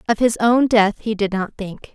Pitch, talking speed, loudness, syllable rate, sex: 215 Hz, 245 wpm, -18 LUFS, 4.6 syllables/s, female